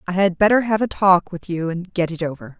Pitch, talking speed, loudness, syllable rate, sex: 180 Hz, 280 wpm, -19 LUFS, 5.7 syllables/s, female